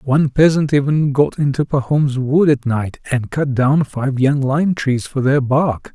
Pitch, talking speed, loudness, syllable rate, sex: 135 Hz, 190 wpm, -16 LUFS, 4.1 syllables/s, male